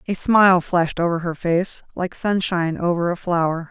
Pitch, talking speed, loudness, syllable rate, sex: 175 Hz, 180 wpm, -20 LUFS, 5.2 syllables/s, female